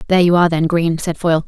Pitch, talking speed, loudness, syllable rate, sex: 170 Hz, 285 wpm, -15 LUFS, 7.9 syllables/s, female